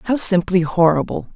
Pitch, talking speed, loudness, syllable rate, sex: 185 Hz, 135 wpm, -17 LUFS, 4.7 syllables/s, female